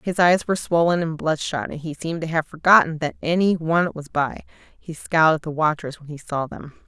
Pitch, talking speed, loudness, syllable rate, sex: 160 Hz, 225 wpm, -21 LUFS, 5.6 syllables/s, female